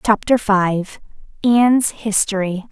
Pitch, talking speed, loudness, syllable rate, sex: 205 Hz, 90 wpm, -17 LUFS, 3.8 syllables/s, female